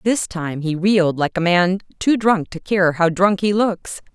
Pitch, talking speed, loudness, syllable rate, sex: 185 Hz, 215 wpm, -18 LUFS, 4.3 syllables/s, female